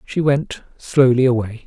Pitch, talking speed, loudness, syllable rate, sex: 130 Hz, 145 wpm, -17 LUFS, 4.2 syllables/s, male